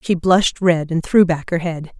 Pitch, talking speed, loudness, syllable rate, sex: 170 Hz, 240 wpm, -17 LUFS, 4.9 syllables/s, female